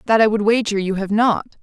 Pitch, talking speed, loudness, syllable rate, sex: 210 Hz, 260 wpm, -18 LUFS, 6.0 syllables/s, female